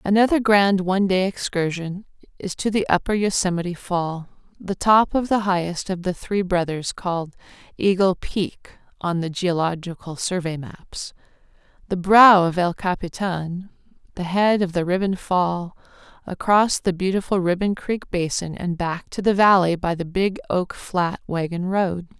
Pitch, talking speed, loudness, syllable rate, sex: 185 Hz, 155 wpm, -21 LUFS, 4.5 syllables/s, female